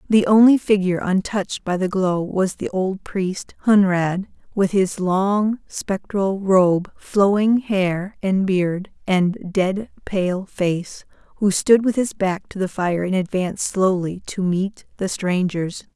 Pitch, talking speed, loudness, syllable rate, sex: 190 Hz, 150 wpm, -20 LUFS, 3.6 syllables/s, female